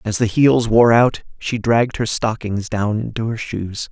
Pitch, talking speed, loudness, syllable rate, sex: 110 Hz, 200 wpm, -18 LUFS, 4.4 syllables/s, male